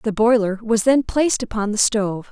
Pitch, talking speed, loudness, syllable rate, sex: 220 Hz, 205 wpm, -18 LUFS, 5.4 syllables/s, female